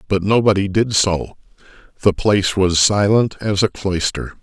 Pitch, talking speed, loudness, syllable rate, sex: 100 Hz, 150 wpm, -17 LUFS, 4.5 syllables/s, male